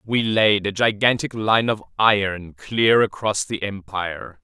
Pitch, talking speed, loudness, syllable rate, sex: 105 Hz, 150 wpm, -20 LUFS, 4.0 syllables/s, male